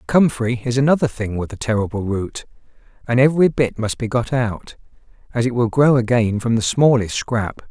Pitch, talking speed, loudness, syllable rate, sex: 120 Hz, 185 wpm, -18 LUFS, 5.2 syllables/s, male